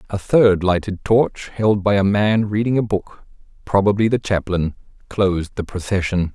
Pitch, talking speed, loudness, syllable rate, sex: 100 Hz, 160 wpm, -18 LUFS, 4.7 syllables/s, male